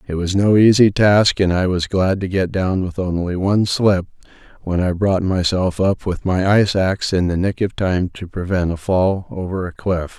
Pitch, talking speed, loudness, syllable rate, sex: 95 Hz, 220 wpm, -18 LUFS, 4.8 syllables/s, male